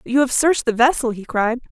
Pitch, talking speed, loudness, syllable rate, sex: 245 Hz, 270 wpm, -18 LUFS, 6.3 syllables/s, female